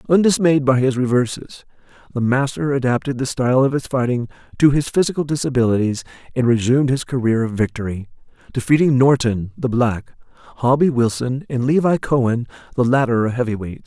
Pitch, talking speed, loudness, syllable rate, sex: 130 Hz, 150 wpm, -18 LUFS, 5.9 syllables/s, male